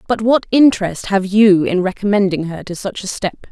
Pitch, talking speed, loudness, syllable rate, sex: 195 Hz, 205 wpm, -15 LUFS, 5.3 syllables/s, female